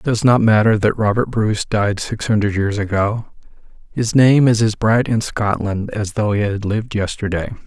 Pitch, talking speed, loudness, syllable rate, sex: 105 Hz, 190 wpm, -17 LUFS, 4.9 syllables/s, male